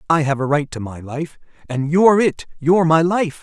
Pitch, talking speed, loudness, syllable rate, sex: 155 Hz, 210 wpm, -18 LUFS, 5.3 syllables/s, male